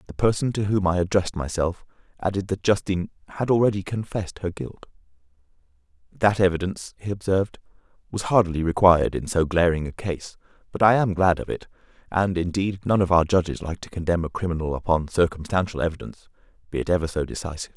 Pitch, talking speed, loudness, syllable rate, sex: 90 Hz, 175 wpm, -23 LUFS, 6.4 syllables/s, male